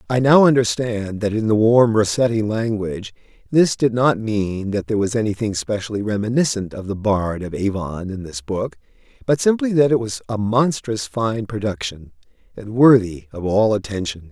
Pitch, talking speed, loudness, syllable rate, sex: 110 Hz, 170 wpm, -19 LUFS, 5.0 syllables/s, male